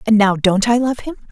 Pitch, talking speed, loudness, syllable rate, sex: 220 Hz, 275 wpm, -15 LUFS, 5.7 syllables/s, female